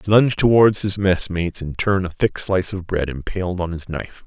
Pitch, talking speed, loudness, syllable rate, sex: 95 Hz, 225 wpm, -20 LUFS, 5.8 syllables/s, male